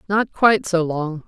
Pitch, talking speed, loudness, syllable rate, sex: 185 Hz, 190 wpm, -19 LUFS, 4.6 syllables/s, female